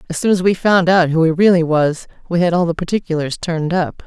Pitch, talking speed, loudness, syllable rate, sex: 170 Hz, 250 wpm, -16 LUFS, 6.0 syllables/s, female